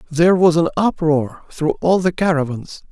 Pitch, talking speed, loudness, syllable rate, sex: 165 Hz, 165 wpm, -17 LUFS, 4.8 syllables/s, male